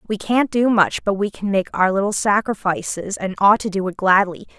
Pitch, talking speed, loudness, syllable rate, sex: 200 Hz, 225 wpm, -19 LUFS, 5.3 syllables/s, female